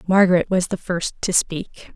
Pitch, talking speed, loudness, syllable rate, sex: 180 Hz, 185 wpm, -20 LUFS, 4.7 syllables/s, female